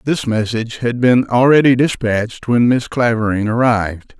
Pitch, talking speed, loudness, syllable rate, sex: 120 Hz, 145 wpm, -15 LUFS, 4.9 syllables/s, male